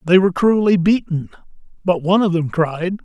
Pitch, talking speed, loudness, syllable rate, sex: 180 Hz, 180 wpm, -17 LUFS, 5.7 syllables/s, male